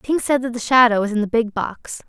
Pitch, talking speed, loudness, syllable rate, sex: 230 Hz, 290 wpm, -18 LUFS, 5.5 syllables/s, female